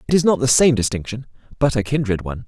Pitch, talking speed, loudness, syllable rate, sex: 120 Hz, 245 wpm, -18 LUFS, 7.1 syllables/s, male